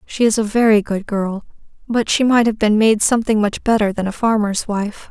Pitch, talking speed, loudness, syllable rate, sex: 215 Hz, 225 wpm, -17 LUFS, 5.3 syllables/s, female